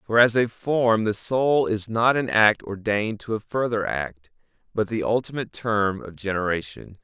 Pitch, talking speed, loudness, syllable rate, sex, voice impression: 110 Hz, 180 wpm, -23 LUFS, 4.6 syllables/s, male, masculine, adult-like, tensed, powerful, clear, fluent, cool, intellectual, calm, wild, lively, slightly strict